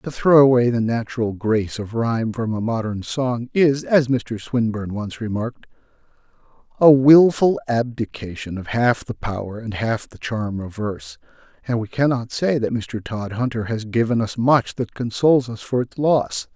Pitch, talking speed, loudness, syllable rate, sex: 115 Hz, 175 wpm, -20 LUFS, 4.8 syllables/s, male